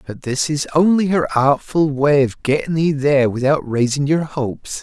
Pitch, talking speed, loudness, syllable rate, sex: 145 Hz, 185 wpm, -17 LUFS, 4.7 syllables/s, male